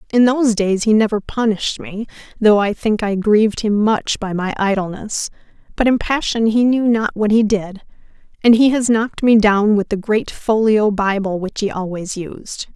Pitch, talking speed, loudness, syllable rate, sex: 215 Hz, 195 wpm, -16 LUFS, 4.8 syllables/s, female